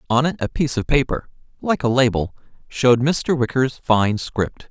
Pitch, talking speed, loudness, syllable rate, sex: 125 Hz, 180 wpm, -20 LUFS, 5.0 syllables/s, male